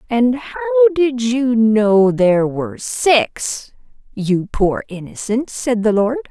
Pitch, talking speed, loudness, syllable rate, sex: 240 Hz, 135 wpm, -16 LUFS, 3.5 syllables/s, female